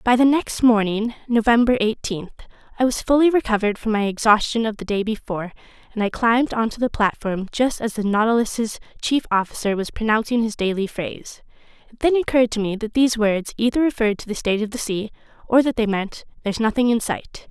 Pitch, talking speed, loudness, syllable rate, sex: 225 Hz, 200 wpm, -20 LUFS, 6.0 syllables/s, female